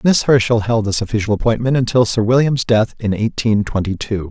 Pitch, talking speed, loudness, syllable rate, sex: 110 Hz, 195 wpm, -16 LUFS, 5.6 syllables/s, male